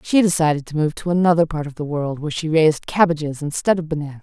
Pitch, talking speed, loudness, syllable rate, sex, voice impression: 155 Hz, 240 wpm, -19 LUFS, 6.8 syllables/s, female, feminine, adult-like, middle-aged, slightly thin, slightly tensed, slightly powerful, bright, slightly soft, clear, fluent, cool, refreshing, sincere, slightly calm, friendly, reassuring, slightly unique, slightly elegant, slightly sweet, lively, strict